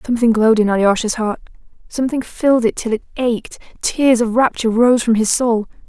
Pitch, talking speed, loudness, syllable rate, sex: 230 Hz, 185 wpm, -16 LUFS, 5.9 syllables/s, female